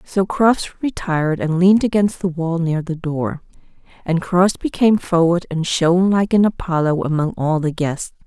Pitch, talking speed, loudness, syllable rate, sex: 175 Hz, 175 wpm, -18 LUFS, 4.6 syllables/s, female